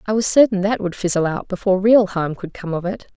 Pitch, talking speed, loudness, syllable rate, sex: 195 Hz, 265 wpm, -18 LUFS, 6.0 syllables/s, female